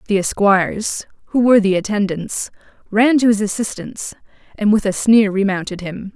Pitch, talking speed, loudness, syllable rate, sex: 205 Hz, 155 wpm, -17 LUFS, 5.3 syllables/s, female